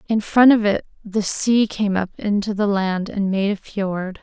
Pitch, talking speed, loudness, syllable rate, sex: 205 Hz, 215 wpm, -19 LUFS, 4.1 syllables/s, female